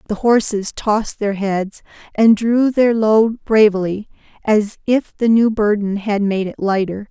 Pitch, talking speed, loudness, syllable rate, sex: 210 Hz, 160 wpm, -16 LUFS, 4.1 syllables/s, female